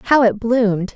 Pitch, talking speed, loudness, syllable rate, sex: 225 Hz, 190 wpm, -16 LUFS, 5.3 syllables/s, female